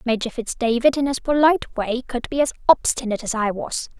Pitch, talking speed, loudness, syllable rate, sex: 245 Hz, 210 wpm, -21 LUFS, 5.9 syllables/s, female